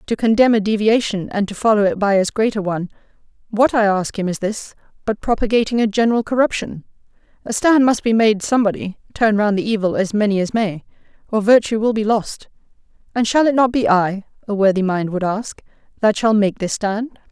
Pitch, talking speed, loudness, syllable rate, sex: 210 Hz, 200 wpm, -17 LUFS, 5.7 syllables/s, female